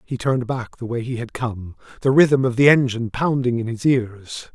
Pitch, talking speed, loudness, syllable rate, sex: 125 Hz, 225 wpm, -20 LUFS, 5.1 syllables/s, male